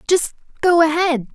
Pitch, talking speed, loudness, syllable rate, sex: 320 Hz, 135 wpm, -17 LUFS, 5.1 syllables/s, female